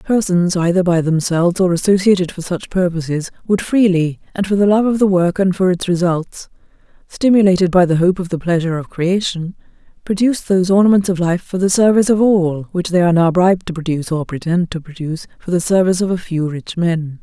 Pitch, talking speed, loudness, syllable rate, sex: 180 Hz, 200 wpm, -16 LUFS, 5.7 syllables/s, female